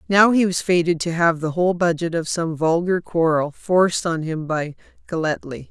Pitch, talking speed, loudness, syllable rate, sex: 170 Hz, 190 wpm, -20 LUFS, 5.0 syllables/s, female